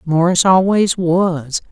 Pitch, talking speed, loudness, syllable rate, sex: 175 Hz, 105 wpm, -14 LUFS, 3.2 syllables/s, female